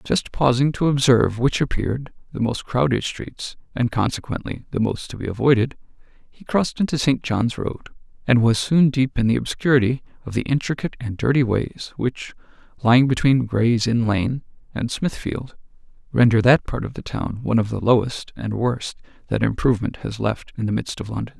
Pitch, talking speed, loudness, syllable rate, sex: 125 Hz, 180 wpm, -21 LUFS, 5.3 syllables/s, male